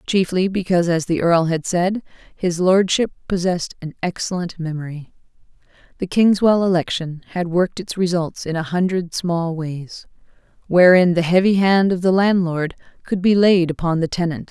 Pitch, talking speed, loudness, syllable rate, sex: 175 Hz, 155 wpm, -18 LUFS, 4.9 syllables/s, female